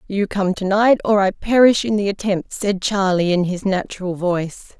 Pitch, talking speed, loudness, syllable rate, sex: 195 Hz, 200 wpm, -18 LUFS, 5.0 syllables/s, female